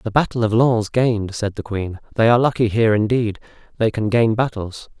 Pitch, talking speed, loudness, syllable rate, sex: 110 Hz, 205 wpm, -19 LUFS, 5.6 syllables/s, male